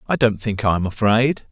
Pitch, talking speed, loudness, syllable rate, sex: 110 Hz, 240 wpm, -19 LUFS, 5.3 syllables/s, male